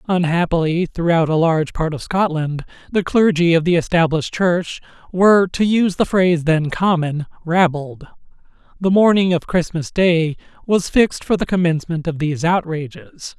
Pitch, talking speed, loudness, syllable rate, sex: 170 Hz, 150 wpm, -17 LUFS, 5.1 syllables/s, male